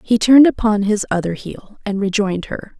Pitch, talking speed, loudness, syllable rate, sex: 210 Hz, 195 wpm, -16 LUFS, 5.4 syllables/s, female